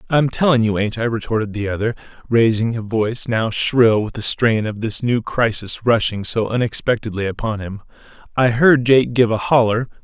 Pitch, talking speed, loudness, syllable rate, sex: 115 Hz, 185 wpm, -18 LUFS, 5.1 syllables/s, male